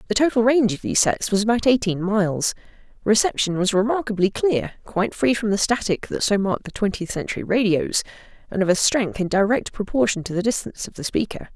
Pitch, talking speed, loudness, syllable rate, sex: 210 Hz, 205 wpm, -21 LUFS, 6.2 syllables/s, female